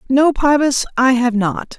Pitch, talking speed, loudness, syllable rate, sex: 255 Hz, 170 wpm, -15 LUFS, 4.4 syllables/s, female